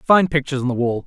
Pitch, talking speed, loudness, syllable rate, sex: 140 Hz, 280 wpm, -19 LUFS, 6.8 syllables/s, male